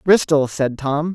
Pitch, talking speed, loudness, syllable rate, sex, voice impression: 150 Hz, 160 wpm, -18 LUFS, 3.8 syllables/s, male, masculine, adult-like, tensed, powerful, bright, slightly soft, slightly raspy, intellectual, calm, friendly, reassuring, slightly wild, slightly kind